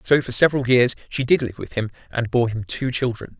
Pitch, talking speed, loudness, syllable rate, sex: 125 Hz, 245 wpm, -21 LUFS, 5.7 syllables/s, male